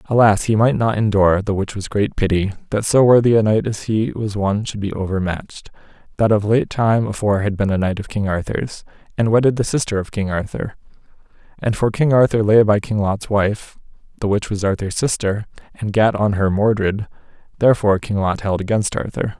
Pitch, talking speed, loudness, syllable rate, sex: 105 Hz, 205 wpm, -18 LUFS, 5.6 syllables/s, male